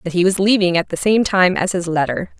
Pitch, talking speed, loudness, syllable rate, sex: 180 Hz, 275 wpm, -16 LUFS, 5.8 syllables/s, female